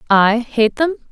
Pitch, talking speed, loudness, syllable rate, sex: 240 Hz, 160 wpm, -16 LUFS, 3.8 syllables/s, female